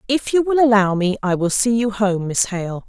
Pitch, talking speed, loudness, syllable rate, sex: 215 Hz, 250 wpm, -18 LUFS, 4.9 syllables/s, female